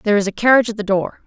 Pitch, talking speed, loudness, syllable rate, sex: 215 Hz, 330 wpm, -16 LUFS, 8.2 syllables/s, female